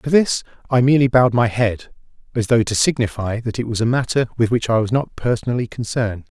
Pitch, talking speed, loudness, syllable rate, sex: 120 Hz, 215 wpm, -19 LUFS, 6.2 syllables/s, male